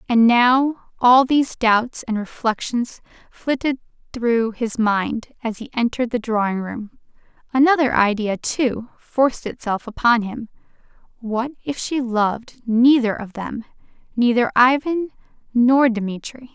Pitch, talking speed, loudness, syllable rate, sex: 240 Hz, 125 wpm, -19 LUFS, 4.1 syllables/s, female